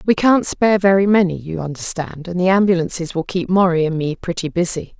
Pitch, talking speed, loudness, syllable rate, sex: 180 Hz, 205 wpm, -17 LUFS, 5.8 syllables/s, female